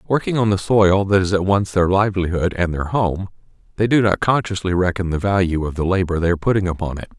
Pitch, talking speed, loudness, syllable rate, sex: 95 Hz, 235 wpm, -18 LUFS, 6.2 syllables/s, male